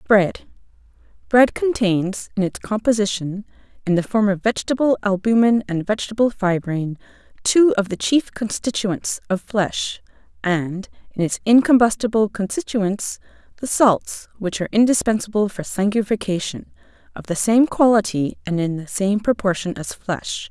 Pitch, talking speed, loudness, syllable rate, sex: 205 Hz, 130 wpm, -20 LUFS, 4.8 syllables/s, female